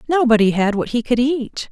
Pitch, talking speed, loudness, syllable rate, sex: 240 Hz, 210 wpm, -17 LUFS, 5.2 syllables/s, female